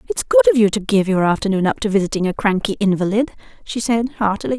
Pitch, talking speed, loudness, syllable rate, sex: 210 Hz, 225 wpm, -18 LUFS, 6.6 syllables/s, female